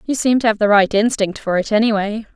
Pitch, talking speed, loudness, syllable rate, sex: 215 Hz, 255 wpm, -16 LUFS, 6.1 syllables/s, female